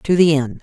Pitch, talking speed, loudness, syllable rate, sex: 155 Hz, 290 wpm, -15 LUFS, 5.1 syllables/s, female